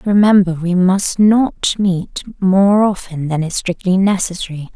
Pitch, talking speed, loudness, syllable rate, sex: 185 Hz, 140 wpm, -15 LUFS, 4.0 syllables/s, female